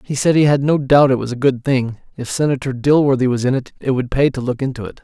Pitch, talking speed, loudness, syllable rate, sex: 130 Hz, 285 wpm, -17 LUFS, 6.2 syllables/s, male